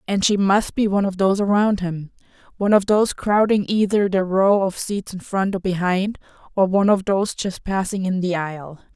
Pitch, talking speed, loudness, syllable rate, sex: 195 Hz, 200 wpm, -20 LUFS, 5.4 syllables/s, female